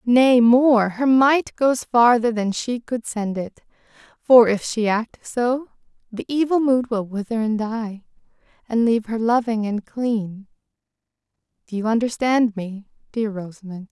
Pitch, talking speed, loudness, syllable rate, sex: 230 Hz, 145 wpm, -20 LUFS, 4.1 syllables/s, female